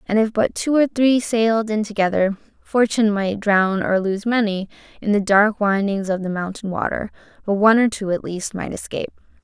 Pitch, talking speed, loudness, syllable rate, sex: 205 Hz, 195 wpm, -20 LUFS, 5.3 syllables/s, female